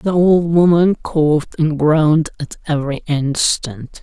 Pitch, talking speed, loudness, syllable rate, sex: 155 Hz, 135 wpm, -15 LUFS, 4.0 syllables/s, male